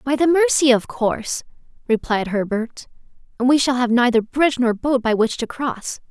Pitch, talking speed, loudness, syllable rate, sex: 245 Hz, 185 wpm, -19 LUFS, 5.1 syllables/s, female